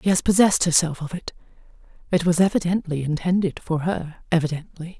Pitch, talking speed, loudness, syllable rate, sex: 170 Hz, 145 wpm, -22 LUFS, 5.9 syllables/s, female